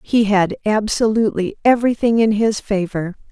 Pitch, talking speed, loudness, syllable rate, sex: 210 Hz, 125 wpm, -17 LUFS, 5.1 syllables/s, female